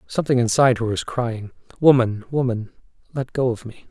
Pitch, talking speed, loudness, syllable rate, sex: 120 Hz, 170 wpm, -21 LUFS, 5.7 syllables/s, male